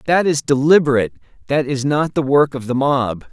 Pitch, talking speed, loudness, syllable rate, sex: 140 Hz, 200 wpm, -17 LUFS, 5.4 syllables/s, male